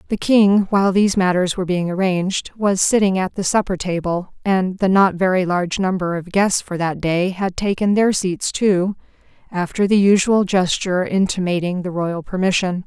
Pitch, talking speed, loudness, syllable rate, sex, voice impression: 185 Hz, 175 wpm, -18 LUFS, 5.0 syllables/s, female, feminine, slightly gender-neutral, middle-aged, slightly thin, slightly tensed, slightly weak, slightly dark, soft, slightly muffled, fluent, cool, very intellectual, refreshing, very sincere, calm, friendly, reassuring, slightly unique, slightly elegant, slightly wild, sweet, lively, kind, modest